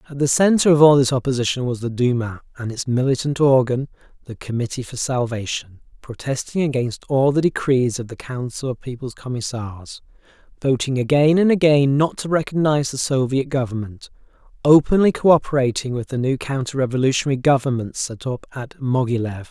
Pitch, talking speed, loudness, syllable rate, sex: 130 Hz, 155 wpm, -19 LUFS, 5.5 syllables/s, male